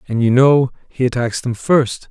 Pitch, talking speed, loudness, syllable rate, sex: 125 Hz, 200 wpm, -16 LUFS, 4.4 syllables/s, male